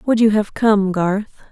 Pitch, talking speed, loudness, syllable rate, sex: 210 Hz, 200 wpm, -17 LUFS, 4.0 syllables/s, female